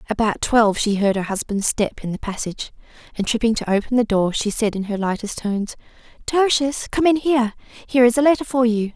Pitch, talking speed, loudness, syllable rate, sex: 230 Hz, 210 wpm, -20 LUFS, 5.8 syllables/s, female